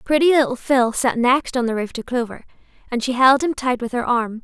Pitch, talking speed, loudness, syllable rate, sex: 250 Hz, 245 wpm, -19 LUFS, 5.5 syllables/s, female